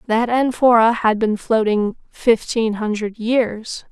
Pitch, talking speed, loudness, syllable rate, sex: 225 Hz, 125 wpm, -18 LUFS, 3.6 syllables/s, female